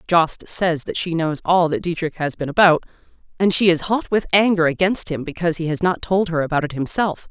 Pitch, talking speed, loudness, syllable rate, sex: 170 Hz, 230 wpm, -19 LUFS, 5.5 syllables/s, female